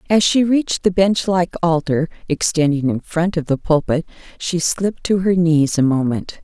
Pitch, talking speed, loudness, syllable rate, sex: 170 Hz, 185 wpm, -18 LUFS, 4.8 syllables/s, female